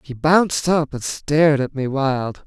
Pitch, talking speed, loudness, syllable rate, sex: 145 Hz, 195 wpm, -19 LUFS, 4.2 syllables/s, male